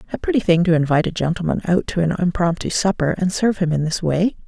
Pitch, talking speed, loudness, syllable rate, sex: 175 Hz, 240 wpm, -19 LUFS, 6.7 syllables/s, female